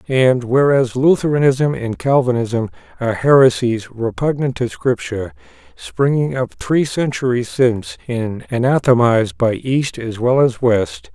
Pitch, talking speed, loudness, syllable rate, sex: 125 Hz, 125 wpm, -17 LUFS, 4.4 syllables/s, male